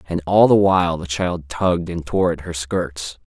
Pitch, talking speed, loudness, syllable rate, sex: 85 Hz, 220 wpm, -19 LUFS, 4.7 syllables/s, male